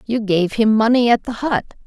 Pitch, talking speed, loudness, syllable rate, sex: 225 Hz, 225 wpm, -17 LUFS, 5.1 syllables/s, female